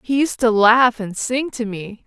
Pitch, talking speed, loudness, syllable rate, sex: 235 Hz, 235 wpm, -17 LUFS, 4.1 syllables/s, female